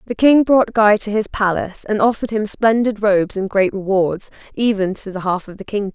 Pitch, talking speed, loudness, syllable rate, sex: 205 Hz, 220 wpm, -17 LUFS, 5.6 syllables/s, female